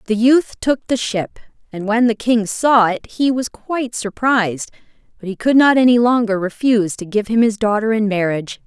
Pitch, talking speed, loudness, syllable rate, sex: 225 Hz, 200 wpm, -16 LUFS, 5.1 syllables/s, female